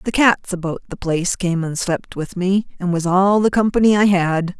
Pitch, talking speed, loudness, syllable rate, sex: 185 Hz, 220 wpm, -18 LUFS, 5.0 syllables/s, female